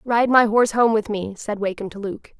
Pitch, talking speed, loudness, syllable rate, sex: 215 Hz, 250 wpm, -20 LUFS, 5.3 syllables/s, female